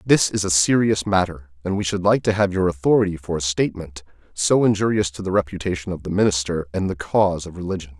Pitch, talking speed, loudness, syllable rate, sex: 90 Hz, 220 wpm, -20 LUFS, 6.2 syllables/s, male